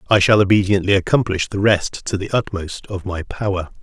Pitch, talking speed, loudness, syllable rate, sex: 95 Hz, 190 wpm, -18 LUFS, 5.4 syllables/s, male